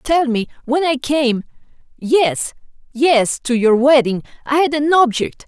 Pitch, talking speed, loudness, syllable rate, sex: 270 Hz, 155 wpm, -16 LUFS, 3.9 syllables/s, female